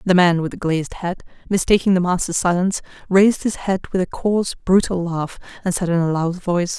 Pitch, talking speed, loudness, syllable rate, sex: 180 Hz, 210 wpm, -19 LUFS, 5.9 syllables/s, female